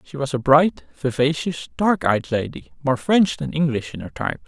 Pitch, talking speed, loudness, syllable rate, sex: 135 Hz, 200 wpm, -21 LUFS, 4.8 syllables/s, male